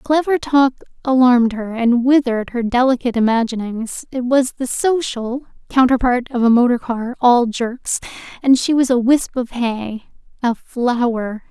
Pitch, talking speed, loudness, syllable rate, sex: 245 Hz, 145 wpm, -17 LUFS, 4.5 syllables/s, female